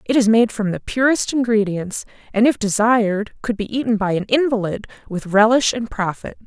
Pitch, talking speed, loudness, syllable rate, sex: 220 Hz, 185 wpm, -18 LUFS, 5.2 syllables/s, female